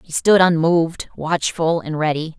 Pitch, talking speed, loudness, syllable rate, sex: 165 Hz, 150 wpm, -18 LUFS, 4.5 syllables/s, female